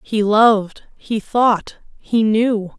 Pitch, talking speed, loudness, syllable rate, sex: 215 Hz, 130 wpm, -16 LUFS, 2.9 syllables/s, female